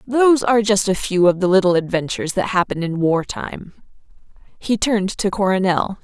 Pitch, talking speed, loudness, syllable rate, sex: 195 Hz, 180 wpm, -18 LUFS, 5.4 syllables/s, female